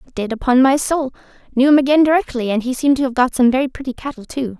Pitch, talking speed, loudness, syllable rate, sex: 260 Hz, 250 wpm, -16 LUFS, 7.0 syllables/s, female